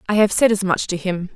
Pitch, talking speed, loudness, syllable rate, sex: 195 Hz, 310 wpm, -18 LUFS, 6.1 syllables/s, female